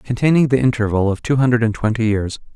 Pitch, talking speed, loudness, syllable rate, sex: 115 Hz, 210 wpm, -17 LUFS, 6.3 syllables/s, male